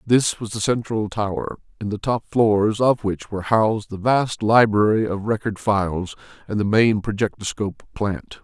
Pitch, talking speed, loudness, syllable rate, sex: 105 Hz, 170 wpm, -21 LUFS, 4.7 syllables/s, male